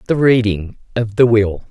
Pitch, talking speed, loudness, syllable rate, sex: 110 Hz, 175 wpm, -15 LUFS, 4.6 syllables/s, female